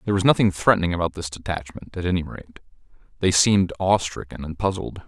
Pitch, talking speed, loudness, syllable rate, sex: 90 Hz, 175 wpm, -22 LUFS, 6.9 syllables/s, male